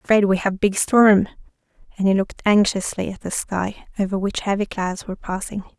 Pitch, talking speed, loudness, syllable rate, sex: 200 Hz, 185 wpm, -20 LUFS, 5.4 syllables/s, female